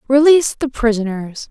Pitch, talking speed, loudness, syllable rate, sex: 250 Hz, 120 wpm, -15 LUFS, 5.5 syllables/s, female